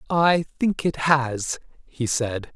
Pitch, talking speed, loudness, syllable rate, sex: 140 Hz, 140 wpm, -23 LUFS, 3.1 syllables/s, male